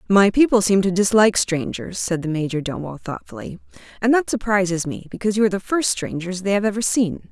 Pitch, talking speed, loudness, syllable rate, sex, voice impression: 195 Hz, 195 wpm, -20 LUFS, 6.0 syllables/s, female, feminine, tensed, slightly powerful, slightly bright, slightly clear, intellectual, slightly elegant, lively